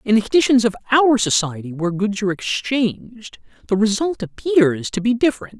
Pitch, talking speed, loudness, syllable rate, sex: 220 Hz, 170 wpm, -18 LUFS, 5.5 syllables/s, male